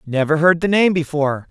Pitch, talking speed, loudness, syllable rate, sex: 160 Hz, 200 wpm, -16 LUFS, 5.8 syllables/s, male